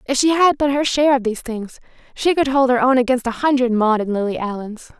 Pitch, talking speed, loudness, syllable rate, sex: 250 Hz, 250 wpm, -17 LUFS, 6.0 syllables/s, female